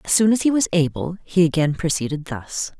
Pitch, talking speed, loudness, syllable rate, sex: 170 Hz, 215 wpm, -20 LUFS, 5.5 syllables/s, female